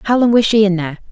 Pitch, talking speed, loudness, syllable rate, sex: 205 Hz, 320 wpm, -13 LUFS, 7.9 syllables/s, female